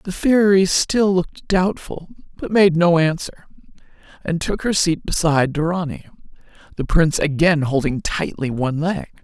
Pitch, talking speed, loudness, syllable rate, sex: 170 Hz, 145 wpm, -18 LUFS, 4.7 syllables/s, female